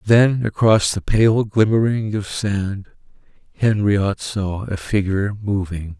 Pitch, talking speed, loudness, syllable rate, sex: 100 Hz, 120 wpm, -19 LUFS, 3.7 syllables/s, male